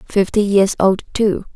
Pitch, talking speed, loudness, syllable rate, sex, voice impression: 200 Hz, 155 wpm, -16 LUFS, 4.3 syllables/s, female, feminine, slightly adult-like, slightly cute, sincere, slightly calm, slightly kind